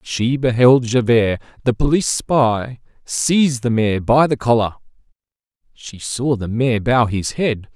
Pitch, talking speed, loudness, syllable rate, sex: 120 Hz, 145 wpm, -17 LUFS, 4.0 syllables/s, male